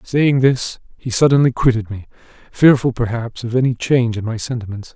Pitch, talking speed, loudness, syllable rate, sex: 120 Hz, 170 wpm, -17 LUFS, 5.4 syllables/s, male